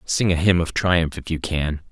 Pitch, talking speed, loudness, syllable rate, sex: 85 Hz, 250 wpm, -21 LUFS, 4.6 syllables/s, male